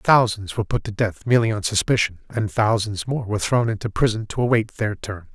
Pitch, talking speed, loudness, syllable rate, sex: 110 Hz, 215 wpm, -22 LUFS, 5.8 syllables/s, male